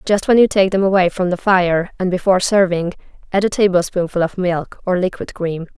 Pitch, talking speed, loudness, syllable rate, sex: 185 Hz, 205 wpm, -17 LUFS, 5.5 syllables/s, female